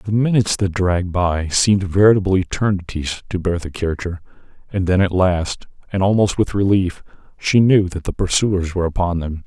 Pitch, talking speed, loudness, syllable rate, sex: 95 Hz, 170 wpm, -18 LUFS, 5.3 syllables/s, male